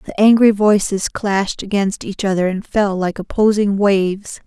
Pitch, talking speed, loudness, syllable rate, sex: 200 Hz, 160 wpm, -16 LUFS, 4.7 syllables/s, female